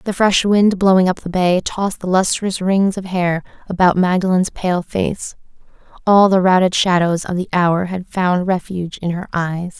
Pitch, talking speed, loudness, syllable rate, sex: 185 Hz, 185 wpm, -16 LUFS, 4.7 syllables/s, female